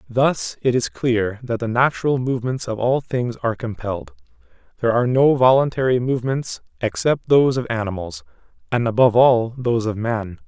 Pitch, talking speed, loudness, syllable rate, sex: 120 Hz, 160 wpm, -20 LUFS, 5.6 syllables/s, male